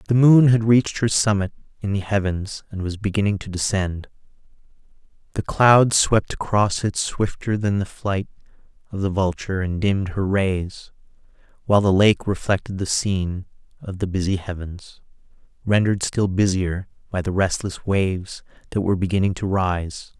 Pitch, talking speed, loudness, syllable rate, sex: 100 Hz, 155 wpm, -21 LUFS, 5.0 syllables/s, male